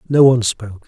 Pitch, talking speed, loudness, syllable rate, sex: 120 Hz, 205 wpm, -14 LUFS, 7.1 syllables/s, male